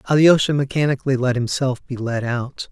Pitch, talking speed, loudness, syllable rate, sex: 130 Hz, 155 wpm, -19 LUFS, 5.6 syllables/s, male